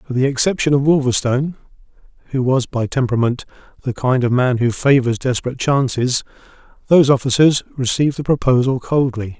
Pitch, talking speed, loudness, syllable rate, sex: 130 Hz, 145 wpm, -17 LUFS, 6.0 syllables/s, male